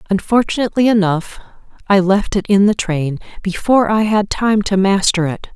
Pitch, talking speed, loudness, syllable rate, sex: 200 Hz, 160 wpm, -15 LUFS, 5.3 syllables/s, female